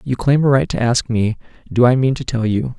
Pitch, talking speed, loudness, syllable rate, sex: 120 Hz, 280 wpm, -17 LUFS, 5.5 syllables/s, male